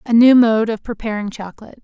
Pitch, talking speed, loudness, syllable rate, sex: 220 Hz, 195 wpm, -15 LUFS, 6.4 syllables/s, female